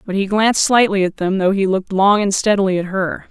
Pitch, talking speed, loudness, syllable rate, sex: 195 Hz, 255 wpm, -16 LUFS, 5.9 syllables/s, female